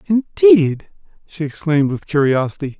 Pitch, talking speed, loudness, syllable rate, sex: 165 Hz, 105 wpm, -16 LUFS, 4.8 syllables/s, male